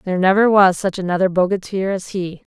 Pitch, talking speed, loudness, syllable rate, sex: 190 Hz, 190 wpm, -17 LUFS, 6.0 syllables/s, female